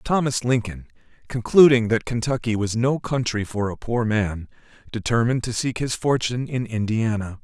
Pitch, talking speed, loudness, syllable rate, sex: 115 Hz, 155 wpm, -22 LUFS, 5.1 syllables/s, male